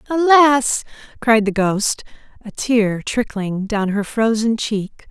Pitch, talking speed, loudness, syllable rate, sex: 225 Hz, 130 wpm, -17 LUFS, 3.4 syllables/s, female